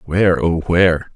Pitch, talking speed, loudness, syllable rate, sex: 85 Hz, 155 wpm, -15 LUFS, 5.3 syllables/s, male